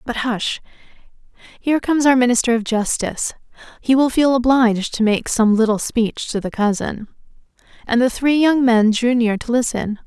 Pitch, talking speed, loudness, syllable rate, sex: 235 Hz, 175 wpm, -17 LUFS, 5.2 syllables/s, female